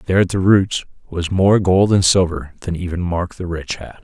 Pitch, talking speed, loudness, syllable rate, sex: 90 Hz, 225 wpm, -17 LUFS, 4.9 syllables/s, male